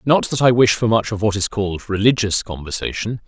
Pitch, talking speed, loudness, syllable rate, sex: 110 Hz, 220 wpm, -18 LUFS, 5.8 syllables/s, male